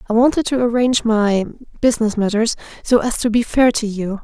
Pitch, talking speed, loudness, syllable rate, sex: 225 Hz, 185 wpm, -17 LUFS, 5.8 syllables/s, female